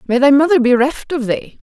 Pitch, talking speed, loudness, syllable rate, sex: 270 Hz, 250 wpm, -14 LUFS, 5.5 syllables/s, female